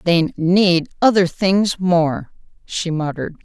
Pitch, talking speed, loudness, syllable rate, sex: 175 Hz, 120 wpm, -17 LUFS, 3.5 syllables/s, female